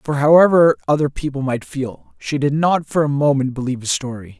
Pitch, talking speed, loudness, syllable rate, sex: 140 Hz, 205 wpm, -17 LUFS, 5.6 syllables/s, male